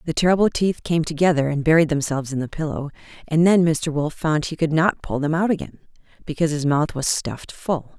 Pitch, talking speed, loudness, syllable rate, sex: 155 Hz, 210 wpm, -21 LUFS, 5.9 syllables/s, female